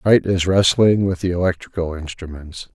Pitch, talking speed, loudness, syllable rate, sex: 90 Hz, 150 wpm, -18 LUFS, 5.0 syllables/s, male